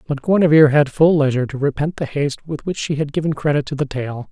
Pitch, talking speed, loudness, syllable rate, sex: 145 Hz, 250 wpm, -18 LUFS, 6.3 syllables/s, male